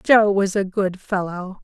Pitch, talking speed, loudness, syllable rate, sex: 195 Hz, 185 wpm, -20 LUFS, 3.9 syllables/s, female